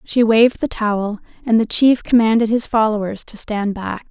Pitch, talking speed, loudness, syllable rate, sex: 220 Hz, 190 wpm, -17 LUFS, 5.1 syllables/s, female